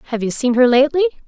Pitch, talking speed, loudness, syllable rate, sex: 270 Hz, 235 wpm, -15 LUFS, 7.0 syllables/s, female